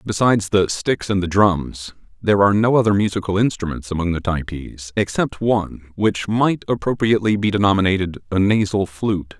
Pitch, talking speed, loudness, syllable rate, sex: 100 Hz, 160 wpm, -19 LUFS, 5.6 syllables/s, male